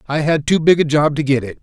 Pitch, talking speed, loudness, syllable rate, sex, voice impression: 150 Hz, 330 wpm, -15 LUFS, 6.3 syllables/s, male, very masculine, very adult-like, slightly old, thick, tensed, powerful, very bright, slightly hard, clear, very fluent, slightly raspy, cool, intellectual, slightly refreshing, sincere, slightly calm, friendly, reassuring, unique, very wild, very lively, strict, slightly intense